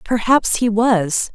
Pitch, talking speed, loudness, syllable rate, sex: 220 Hz, 135 wpm, -16 LUFS, 3.2 syllables/s, female